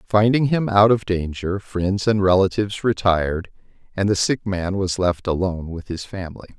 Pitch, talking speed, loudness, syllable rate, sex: 95 Hz, 175 wpm, -20 LUFS, 5.0 syllables/s, male